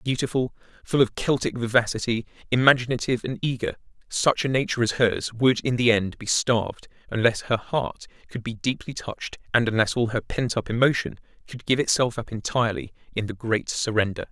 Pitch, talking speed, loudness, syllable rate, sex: 120 Hz, 175 wpm, -24 LUFS, 5.7 syllables/s, male